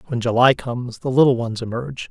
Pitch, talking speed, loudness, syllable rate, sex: 125 Hz, 200 wpm, -19 LUFS, 6.2 syllables/s, male